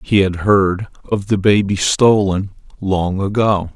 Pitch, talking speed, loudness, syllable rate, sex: 100 Hz, 145 wpm, -16 LUFS, 3.8 syllables/s, male